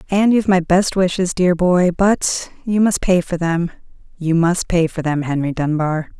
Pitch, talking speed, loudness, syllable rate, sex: 175 Hz, 175 wpm, -17 LUFS, 4.6 syllables/s, female